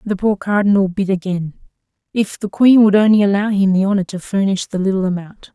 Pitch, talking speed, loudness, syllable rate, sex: 195 Hz, 195 wpm, -16 LUFS, 5.8 syllables/s, female